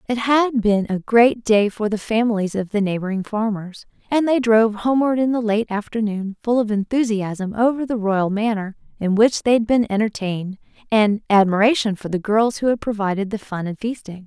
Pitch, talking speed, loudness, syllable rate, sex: 215 Hz, 195 wpm, -19 LUFS, 5.2 syllables/s, female